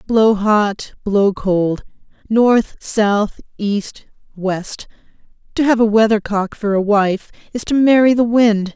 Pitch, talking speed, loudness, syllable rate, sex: 215 Hz, 130 wpm, -16 LUFS, 3.5 syllables/s, female